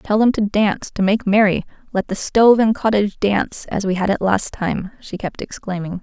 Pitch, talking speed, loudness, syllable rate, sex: 205 Hz, 220 wpm, -18 LUFS, 5.3 syllables/s, female